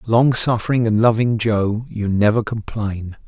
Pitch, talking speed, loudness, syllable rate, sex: 110 Hz, 145 wpm, -18 LUFS, 4.3 syllables/s, male